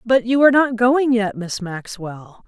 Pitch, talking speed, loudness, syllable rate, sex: 225 Hz, 195 wpm, -17 LUFS, 4.2 syllables/s, female